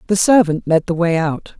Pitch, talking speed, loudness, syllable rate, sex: 175 Hz, 225 wpm, -16 LUFS, 5.0 syllables/s, female